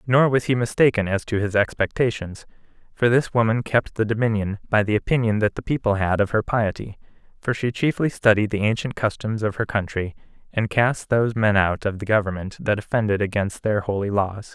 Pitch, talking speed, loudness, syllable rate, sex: 110 Hz, 200 wpm, -22 LUFS, 5.5 syllables/s, male